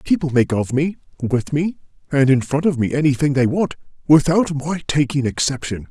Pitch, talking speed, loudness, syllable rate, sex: 145 Hz, 185 wpm, -19 LUFS, 5.2 syllables/s, male